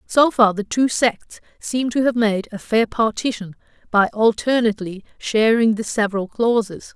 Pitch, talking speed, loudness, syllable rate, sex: 220 Hz, 155 wpm, -19 LUFS, 4.6 syllables/s, female